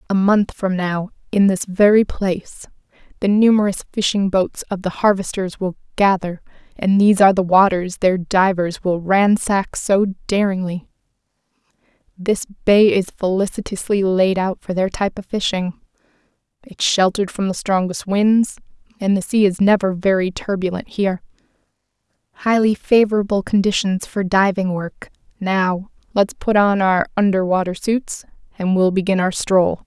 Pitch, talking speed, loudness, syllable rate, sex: 195 Hz, 145 wpm, -18 LUFS, 4.7 syllables/s, female